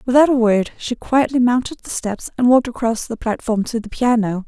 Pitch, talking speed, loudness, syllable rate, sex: 235 Hz, 215 wpm, -18 LUFS, 5.5 syllables/s, female